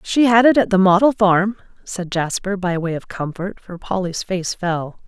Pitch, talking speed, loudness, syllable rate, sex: 190 Hz, 200 wpm, -18 LUFS, 4.5 syllables/s, female